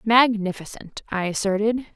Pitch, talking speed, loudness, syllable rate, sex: 210 Hz, 90 wpm, -22 LUFS, 4.7 syllables/s, female